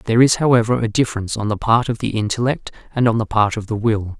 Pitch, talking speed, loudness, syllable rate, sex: 115 Hz, 260 wpm, -18 LUFS, 6.6 syllables/s, male